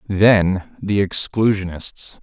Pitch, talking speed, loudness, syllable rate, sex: 100 Hz, 80 wpm, -18 LUFS, 3.0 syllables/s, male